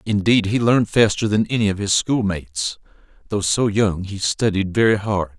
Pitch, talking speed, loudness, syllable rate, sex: 100 Hz, 180 wpm, -19 LUFS, 5.1 syllables/s, male